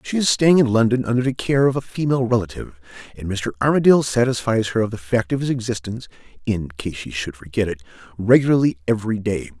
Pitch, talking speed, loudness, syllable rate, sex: 110 Hz, 200 wpm, -20 LUFS, 6.1 syllables/s, male